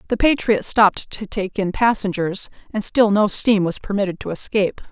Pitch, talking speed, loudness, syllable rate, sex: 205 Hz, 185 wpm, -19 LUFS, 5.2 syllables/s, female